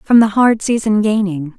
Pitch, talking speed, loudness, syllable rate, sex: 210 Hz, 190 wpm, -14 LUFS, 4.6 syllables/s, female